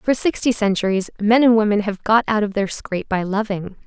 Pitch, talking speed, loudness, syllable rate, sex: 210 Hz, 215 wpm, -19 LUFS, 5.5 syllables/s, female